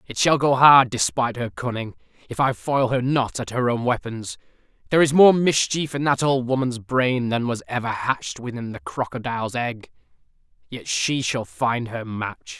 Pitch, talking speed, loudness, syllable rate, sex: 120 Hz, 185 wpm, -21 LUFS, 4.8 syllables/s, male